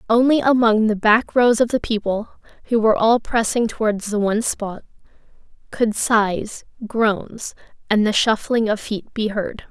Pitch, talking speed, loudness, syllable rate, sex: 220 Hz, 160 wpm, -19 LUFS, 4.4 syllables/s, female